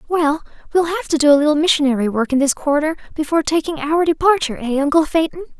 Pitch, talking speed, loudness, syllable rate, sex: 305 Hz, 205 wpm, -17 LUFS, 6.7 syllables/s, female